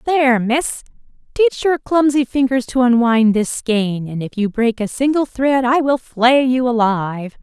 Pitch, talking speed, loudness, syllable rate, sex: 250 Hz, 180 wpm, -16 LUFS, 4.3 syllables/s, female